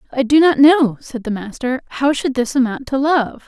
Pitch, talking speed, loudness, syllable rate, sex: 265 Hz, 225 wpm, -16 LUFS, 5.0 syllables/s, female